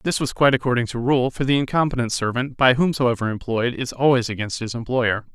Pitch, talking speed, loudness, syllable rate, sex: 125 Hz, 200 wpm, -21 LUFS, 6.0 syllables/s, male